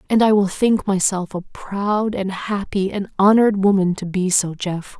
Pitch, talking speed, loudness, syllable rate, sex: 195 Hz, 190 wpm, -19 LUFS, 4.5 syllables/s, female